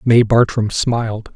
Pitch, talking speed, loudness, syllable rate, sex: 115 Hz, 135 wpm, -16 LUFS, 4.0 syllables/s, male